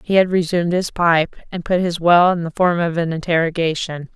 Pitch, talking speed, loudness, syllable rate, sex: 170 Hz, 215 wpm, -18 LUFS, 5.4 syllables/s, female